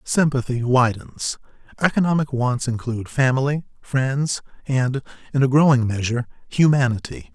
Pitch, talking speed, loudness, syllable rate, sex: 130 Hz, 105 wpm, -21 LUFS, 4.9 syllables/s, male